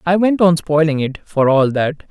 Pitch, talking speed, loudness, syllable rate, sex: 160 Hz, 230 wpm, -15 LUFS, 4.6 syllables/s, male